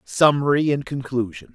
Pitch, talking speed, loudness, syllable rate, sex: 135 Hz, 115 wpm, -21 LUFS, 4.8 syllables/s, male